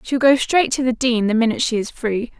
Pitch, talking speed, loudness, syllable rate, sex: 240 Hz, 275 wpm, -18 LUFS, 5.8 syllables/s, female